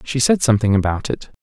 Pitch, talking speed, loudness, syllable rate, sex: 120 Hz, 210 wpm, -17 LUFS, 6.4 syllables/s, male